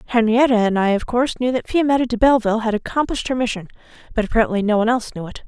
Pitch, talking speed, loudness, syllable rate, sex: 230 Hz, 230 wpm, -18 LUFS, 7.9 syllables/s, female